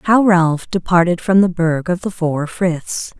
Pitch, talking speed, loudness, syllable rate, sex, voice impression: 175 Hz, 190 wpm, -16 LUFS, 3.9 syllables/s, female, very feminine, very middle-aged, very thin, very tensed, powerful, slightly weak, very bright, slightly soft, clear, fluent, slightly raspy, very cute, intellectual, refreshing, sincere, slightly calm, very friendly, very reassuring, unique, slightly elegant, wild, sweet, lively, slightly strict, slightly sharp